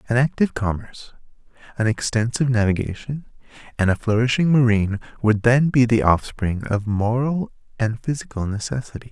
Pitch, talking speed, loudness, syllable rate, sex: 115 Hz, 130 wpm, -21 LUFS, 5.6 syllables/s, male